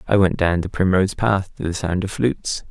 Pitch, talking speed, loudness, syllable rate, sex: 95 Hz, 245 wpm, -20 LUFS, 5.6 syllables/s, male